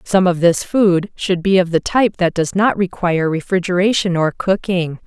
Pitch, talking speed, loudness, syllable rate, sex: 185 Hz, 190 wpm, -16 LUFS, 4.9 syllables/s, female